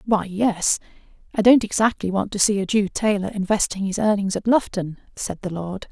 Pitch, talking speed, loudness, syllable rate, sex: 200 Hz, 195 wpm, -21 LUFS, 5.2 syllables/s, female